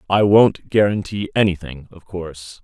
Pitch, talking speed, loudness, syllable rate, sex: 95 Hz, 135 wpm, -17 LUFS, 4.7 syllables/s, male